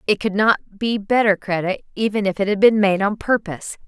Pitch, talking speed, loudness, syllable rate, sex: 205 Hz, 215 wpm, -19 LUFS, 5.8 syllables/s, female